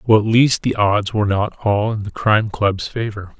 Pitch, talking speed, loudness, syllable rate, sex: 105 Hz, 230 wpm, -18 LUFS, 4.9 syllables/s, male